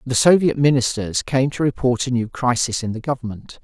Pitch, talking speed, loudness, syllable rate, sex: 125 Hz, 200 wpm, -19 LUFS, 5.4 syllables/s, male